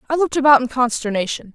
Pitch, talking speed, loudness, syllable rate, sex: 255 Hz, 195 wpm, -17 LUFS, 7.3 syllables/s, female